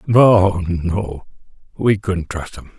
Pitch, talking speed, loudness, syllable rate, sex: 95 Hz, 110 wpm, -17 LUFS, 3.4 syllables/s, male